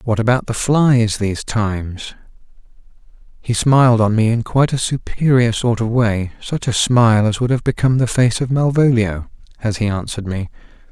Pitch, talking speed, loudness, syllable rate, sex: 115 Hz, 165 wpm, -16 LUFS, 5.3 syllables/s, male